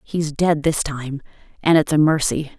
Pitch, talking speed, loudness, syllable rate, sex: 150 Hz, 210 wpm, -19 LUFS, 4.9 syllables/s, female